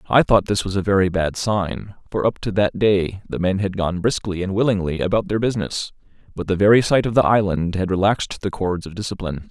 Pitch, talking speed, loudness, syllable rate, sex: 100 Hz, 225 wpm, -20 LUFS, 5.8 syllables/s, male